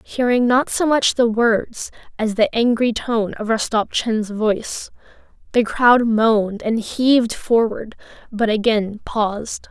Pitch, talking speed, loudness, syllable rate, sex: 225 Hz, 135 wpm, -18 LUFS, 3.8 syllables/s, female